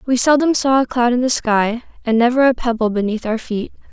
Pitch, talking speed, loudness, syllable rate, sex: 240 Hz, 230 wpm, -17 LUFS, 5.6 syllables/s, female